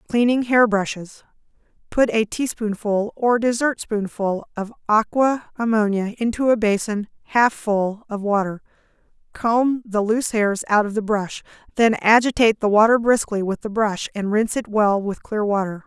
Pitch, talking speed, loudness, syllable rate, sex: 215 Hz, 150 wpm, -20 LUFS, 4.7 syllables/s, female